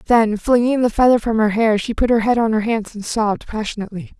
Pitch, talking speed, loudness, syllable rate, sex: 225 Hz, 245 wpm, -17 LUFS, 6.1 syllables/s, female